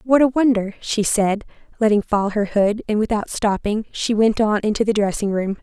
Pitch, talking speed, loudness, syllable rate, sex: 215 Hz, 205 wpm, -19 LUFS, 5.0 syllables/s, female